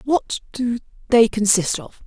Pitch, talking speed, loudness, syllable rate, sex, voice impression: 225 Hz, 145 wpm, -19 LUFS, 3.9 syllables/s, female, very masculine, very adult-like, very middle-aged, slightly thick